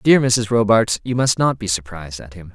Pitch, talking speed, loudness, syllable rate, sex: 110 Hz, 235 wpm, -17 LUFS, 5.2 syllables/s, male